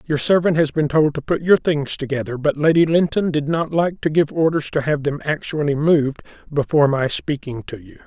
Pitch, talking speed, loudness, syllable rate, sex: 150 Hz, 215 wpm, -19 LUFS, 5.4 syllables/s, male